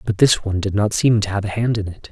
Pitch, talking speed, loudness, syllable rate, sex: 105 Hz, 340 wpm, -19 LUFS, 6.6 syllables/s, male